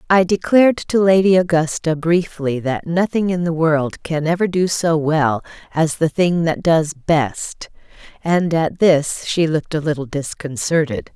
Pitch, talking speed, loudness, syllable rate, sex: 165 Hz, 160 wpm, -17 LUFS, 4.3 syllables/s, female